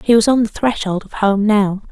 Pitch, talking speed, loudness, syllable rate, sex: 210 Hz, 250 wpm, -16 LUFS, 5.0 syllables/s, female